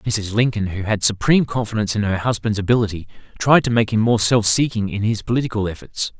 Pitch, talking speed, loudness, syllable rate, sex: 110 Hz, 205 wpm, -19 LUFS, 6.2 syllables/s, male